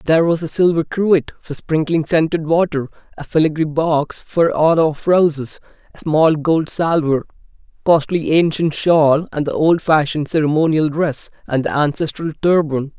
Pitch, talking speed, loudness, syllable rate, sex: 155 Hz, 150 wpm, -16 LUFS, 4.7 syllables/s, male